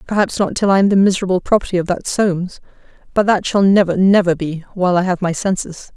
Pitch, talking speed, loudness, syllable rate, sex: 185 Hz, 210 wpm, -16 LUFS, 6.3 syllables/s, female